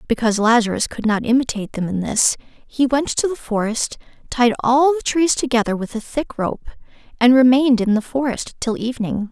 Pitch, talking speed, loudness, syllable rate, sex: 240 Hz, 185 wpm, -18 LUFS, 5.4 syllables/s, female